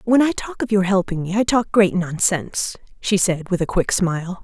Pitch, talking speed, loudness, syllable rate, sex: 195 Hz, 230 wpm, -20 LUFS, 5.2 syllables/s, female